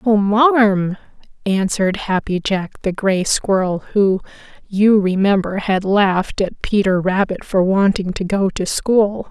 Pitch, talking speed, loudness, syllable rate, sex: 200 Hz, 140 wpm, -17 LUFS, 4.0 syllables/s, female